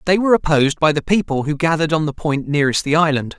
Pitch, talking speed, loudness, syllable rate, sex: 155 Hz, 250 wpm, -17 LUFS, 7.1 syllables/s, male